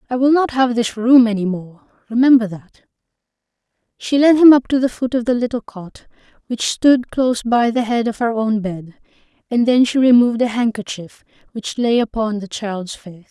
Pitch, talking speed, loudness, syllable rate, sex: 230 Hz, 195 wpm, -16 LUFS, 5.0 syllables/s, female